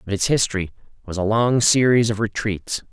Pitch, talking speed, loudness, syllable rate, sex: 105 Hz, 185 wpm, -19 LUFS, 5.4 syllables/s, male